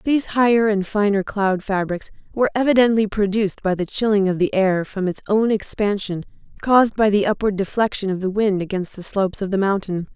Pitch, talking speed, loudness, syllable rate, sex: 205 Hz, 195 wpm, -20 LUFS, 5.7 syllables/s, female